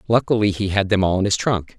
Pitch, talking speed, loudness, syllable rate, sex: 100 Hz, 270 wpm, -19 LUFS, 6.1 syllables/s, male